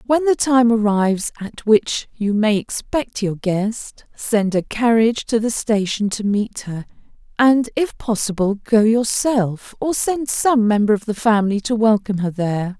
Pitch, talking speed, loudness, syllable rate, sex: 220 Hz, 170 wpm, -18 LUFS, 4.3 syllables/s, female